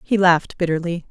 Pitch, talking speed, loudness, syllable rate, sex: 175 Hz, 165 wpm, -19 LUFS, 5.9 syllables/s, female